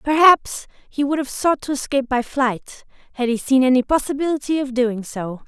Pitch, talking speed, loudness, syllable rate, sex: 265 Hz, 185 wpm, -19 LUFS, 5.2 syllables/s, female